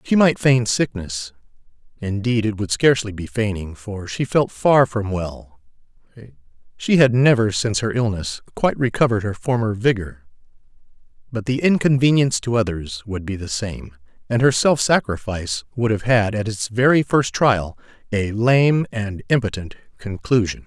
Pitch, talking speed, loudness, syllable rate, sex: 110 Hz, 150 wpm, -19 LUFS, 4.9 syllables/s, male